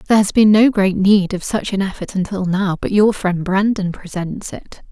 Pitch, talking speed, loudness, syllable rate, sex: 195 Hz, 220 wpm, -16 LUFS, 5.0 syllables/s, female